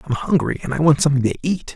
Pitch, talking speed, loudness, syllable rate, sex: 150 Hz, 275 wpm, -19 LUFS, 7.2 syllables/s, male